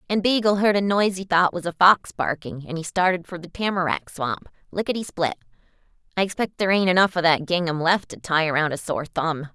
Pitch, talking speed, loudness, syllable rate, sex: 175 Hz, 220 wpm, -22 LUFS, 5.8 syllables/s, female